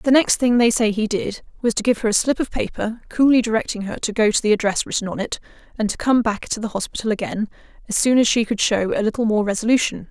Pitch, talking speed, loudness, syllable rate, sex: 220 Hz, 260 wpm, -20 LUFS, 6.3 syllables/s, female